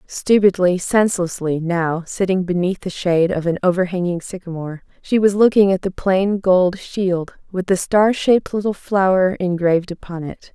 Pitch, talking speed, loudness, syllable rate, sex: 185 Hz, 160 wpm, -18 LUFS, 4.9 syllables/s, female